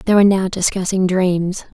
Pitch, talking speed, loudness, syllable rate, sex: 185 Hz, 165 wpm, -17 LUFS, 5.1 syllables/s, female